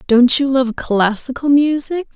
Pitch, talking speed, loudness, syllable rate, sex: 265 Hz, 140 wpm, -15 LUFS, 4.1 syllables/s, female